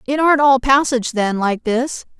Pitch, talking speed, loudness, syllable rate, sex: 255 Hz, 190 wpm, -16 LUFS, 5.1 syllables/s, female